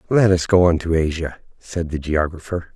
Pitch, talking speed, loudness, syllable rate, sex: 85 Hz, 195 wpm, -20 LUFS, 5.1 syllables/s, male